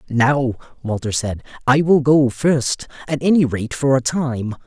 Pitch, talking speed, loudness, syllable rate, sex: 130 Hz, 165 wpm, -18 LUFS, 4.4 syllables/s, male